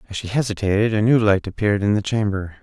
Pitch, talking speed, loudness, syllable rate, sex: 105 Hz, 230 wpm, -20 LUFS, 6.7 syllables/s, male